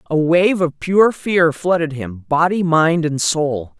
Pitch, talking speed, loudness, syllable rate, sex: 170 Hz, 175 wpm, -16 LUFS, 3.7 syllables/s, female